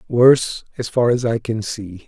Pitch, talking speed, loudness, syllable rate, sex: 115 Hz, 205 wpm, -18 LUFS, 4.6 syllables/s, male